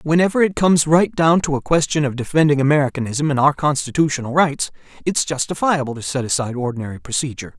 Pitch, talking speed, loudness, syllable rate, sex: 145 Hz, 175 wpm, -18 LUFS, 6.6 syllables/s, male